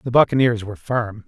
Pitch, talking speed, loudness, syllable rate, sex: 115 Hz, 190 wpm, -20 LUFS, 6.0 syllables/s, male